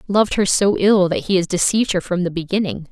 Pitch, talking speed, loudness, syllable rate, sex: 190 Hz, 245 wpm, -17 LUFS, 6.2 syllables/s, female